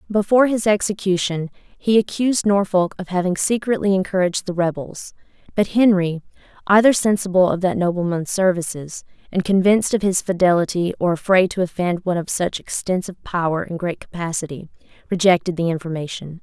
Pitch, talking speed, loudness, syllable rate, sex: 185 Hz, 145 wpm, -19 LUFS, 5.8 syllables/s, female